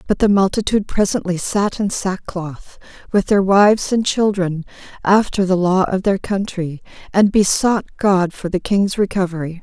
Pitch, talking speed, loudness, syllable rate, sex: 190 Hz, 155 wpm, -17 LUFS, 4.6 syllables/s, female